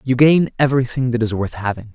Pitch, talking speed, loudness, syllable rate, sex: 125 Hz, 215 wpm, -17 LUFS, 6.2 syllables/s, male